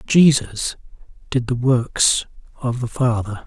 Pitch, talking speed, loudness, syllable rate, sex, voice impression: 125 Hz, 120 wpm, -19 LUFS, 3.6 syllables/s, male, very masculine, old, very thick, slightly tensed, very powerful, dark, soft, muffled, fluent, very raspy, slightly cool, intellectual, sincere, slightly calm, very mature, slightly friendly, slightly reassuring, very unique, slightly elegant, wild, slightly sweet, lively, strict, intense, very sharp